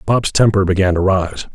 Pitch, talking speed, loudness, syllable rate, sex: 95 Hz, 195 wpm, -15 LUFS, 5.0 syllables/s, male